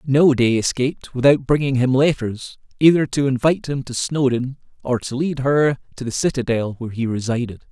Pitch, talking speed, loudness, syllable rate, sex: 130 Hz, 180 wpm, -19 LUFS, 5.4 syllables/s, male